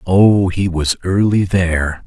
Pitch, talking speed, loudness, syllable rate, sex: 90 Hz, 145 wpm, -15 LUFS, 3.7 syllables/s, male